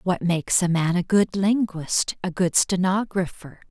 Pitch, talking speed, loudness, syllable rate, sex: 180 Hz, 160 wpm, -22 LUFS, 4.3 syllables/s, female